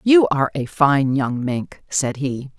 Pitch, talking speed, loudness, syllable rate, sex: 140 Hz, 185 wpm, -19 LUFS, 3.9 syllables/s, female